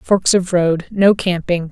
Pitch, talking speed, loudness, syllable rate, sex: 180 Hz, 140 wpm, -16 LUFS, 3.8 syllables/s, female